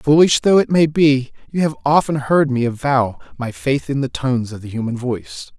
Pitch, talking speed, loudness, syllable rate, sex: 130 Hz, 215 wpm, -17 LUFS, 5.1 syllables/s, male